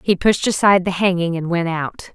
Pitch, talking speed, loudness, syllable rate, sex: 180 Hz, 225 wpm, -18 LUFS, 5.4 syllables/s, female